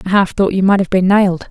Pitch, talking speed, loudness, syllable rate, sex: 190 Hz, 320 wpm, -13 LUFS, 6.7 syllables/s, female